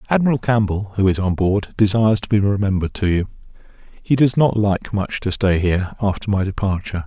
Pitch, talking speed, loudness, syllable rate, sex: 100 Hz, 195 wpm, -19 LUFS, 6.0 syllables/s, male